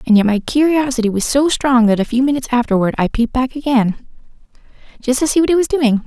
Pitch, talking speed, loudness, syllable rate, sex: 255 Hz, 225 wpm, -15 LUFS, 6.6 syllables/s, female